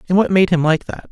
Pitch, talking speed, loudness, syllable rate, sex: 165 Hz, 320 wpm, -16 LUFS, 6.5 syllables/s, male